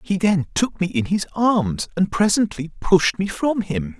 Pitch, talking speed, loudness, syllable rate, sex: 180 Hz, 195 wpm, -20 LUFS, 4.2 syllables/s, male